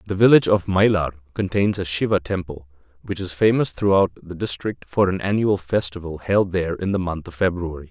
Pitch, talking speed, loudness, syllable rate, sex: 90 Hz, 190 wpm, -21 LUFS, 5.6 syllables/s, male